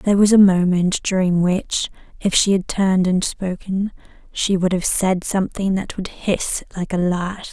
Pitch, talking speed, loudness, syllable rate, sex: 185 Hz, 185 wpm, -19 LUFS, 4.5 syllables/s, female